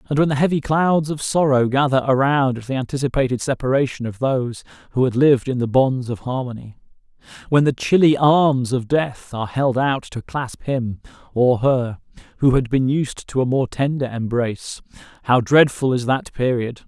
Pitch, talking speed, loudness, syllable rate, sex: 130 Hz, 180 wpm, -19 LUFS, 5.1 syllables/s, male